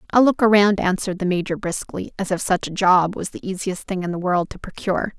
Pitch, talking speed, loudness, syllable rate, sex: 190 Hz, 245 wpm, -21 LUFS, 5.9 syllables/s, female